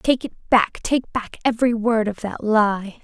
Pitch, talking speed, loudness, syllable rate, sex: 225 Hz, 180 wpm, -21 LUFS, 4.4 syllables/s, female